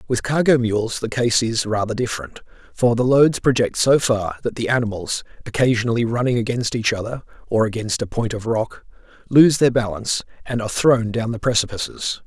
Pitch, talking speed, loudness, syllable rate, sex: 115 Hz, 180 wpm, -20 LUFS, 5.4 syllables/s, male